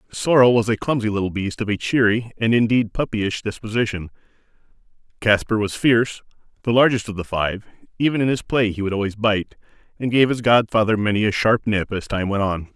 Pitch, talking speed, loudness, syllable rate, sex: 110 Hz, 195 wpm, -20 LUFS, 5.7 syllables/s, male